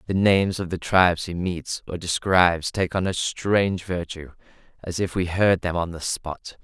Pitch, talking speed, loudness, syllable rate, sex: 90 Hz, 200 wpm, -23 LUFS, 4.7 syllables/s, male